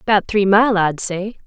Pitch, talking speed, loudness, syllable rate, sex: 200 Hz, 205 wpm, -16 LUFS, 3.9 syllables/s, female